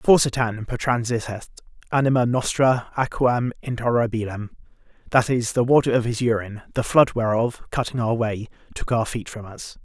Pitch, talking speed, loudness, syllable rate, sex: 120 Hz, 145 wpm, -22 LUFS, 5.3 syllables/s, male